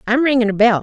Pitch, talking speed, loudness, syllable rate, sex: 230 Hz, 290 wpm, -15 LUFS, 7.3 syllables/s, female